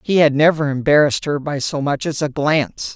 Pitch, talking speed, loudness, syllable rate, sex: 145 Hz, 225 wpm, -17 LUFS, 5.6 syllables/s, female